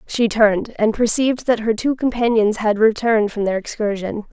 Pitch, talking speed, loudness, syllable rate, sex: 220 Hz, 180 wpm, -18 LUFS, 5.3 syllables/s, female